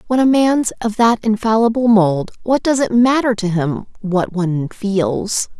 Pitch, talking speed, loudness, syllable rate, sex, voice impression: 215 Hz, 170 wpm, -16 LUFS, 4.2 syllables/s, female, very feminine, slightly gender-neutral, young, slightly adult-like, very thin, slightly tensed, slightly powerful, bright, slightly hard, clear, fluent, cute, slightly cool, intellectual, slightly refreshing, slightly sincere, slightly calm, friendly, reassuring, unique, slightly strict, slightly sharp, slightly modest